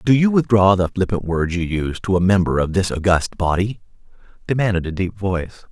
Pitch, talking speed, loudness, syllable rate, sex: 95 Hz, 200 wpm, -19 LUFS, 5.5 syllables/s, male